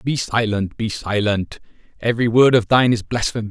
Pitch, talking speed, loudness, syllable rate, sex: 110 Hz, 170 wpm, -18 LUFS, 5.5 syllables/s, male